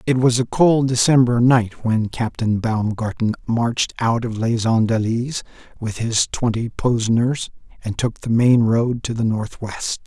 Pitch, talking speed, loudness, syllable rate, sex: 115 Hz, 160 wpm, -19 LUFS, 4.3 syllables/s, male